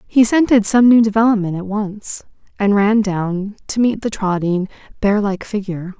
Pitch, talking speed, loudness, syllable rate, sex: 205 Hz, 170 wpm, -16 LUFS, 4.7 syllables/s, female